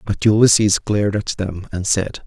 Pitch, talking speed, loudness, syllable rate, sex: 100 Hz, 185 wpm, -17 LUFS, 4.7 syllables/s, male